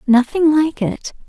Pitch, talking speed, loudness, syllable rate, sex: 285 Hz, 140 wpm, -16 LUFS, 4.0 syllables/s, female